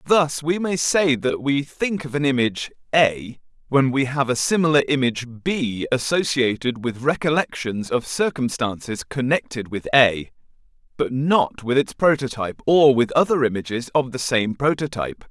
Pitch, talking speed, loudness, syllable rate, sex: 135 Hz, 155 wpm, -21 LUFS, 4.8 syllables/s, male